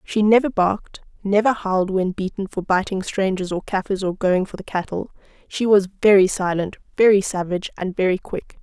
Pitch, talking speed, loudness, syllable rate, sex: 195 Hz, 180 wpm, -20 LUFS, 5.4 syllables/s, female